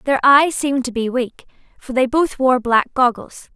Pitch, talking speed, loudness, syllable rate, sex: 260 Hz, 205 wpm, -17 LUFS, 4.5 syllables/s, female